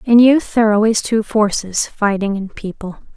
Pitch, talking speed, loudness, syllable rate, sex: 215 Hz, 190 wpm, -15 LUFS, 5.5 syllables/s, female